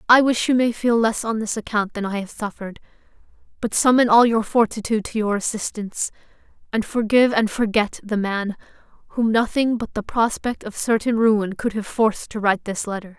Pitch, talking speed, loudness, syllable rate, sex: 220 Hz, 190 wpm, -21 LUFS, 5.6 syllables/s, female